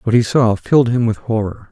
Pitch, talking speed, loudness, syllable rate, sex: 115 Hz, 245 wpm, -16 LUFS, 5.6 syllables/s, male